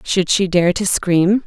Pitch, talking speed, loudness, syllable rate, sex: 185 Hz, 205 wpm, -16 LUFS, 3.7 syllables/s, female